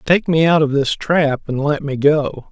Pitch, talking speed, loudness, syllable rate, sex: 150 Hz, 240 wpm, -16 LUFS, 4.3 syllables/s, male